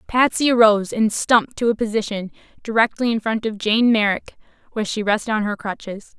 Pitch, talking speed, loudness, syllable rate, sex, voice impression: 220 Hz, 185 wpm, -19 LUFS, 5.8 syllables/s, female, slightly feminine, slightly adult-like, clear, refreshing, slightly calm, friendly, kind